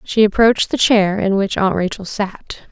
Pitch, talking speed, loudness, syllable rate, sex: 205 Hz, 200 wpm, -16 LUFS, 4.6 syllables/s, female